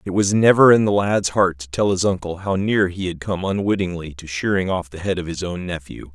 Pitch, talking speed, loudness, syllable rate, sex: 95 Hz, 255 wpm, -19 LUFS, 5.5 syllables/s, male